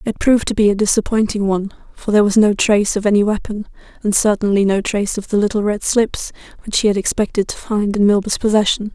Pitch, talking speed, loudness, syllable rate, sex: 205 Hz, 220 wpm, -16 LUFS, 6.4 syllables/s, female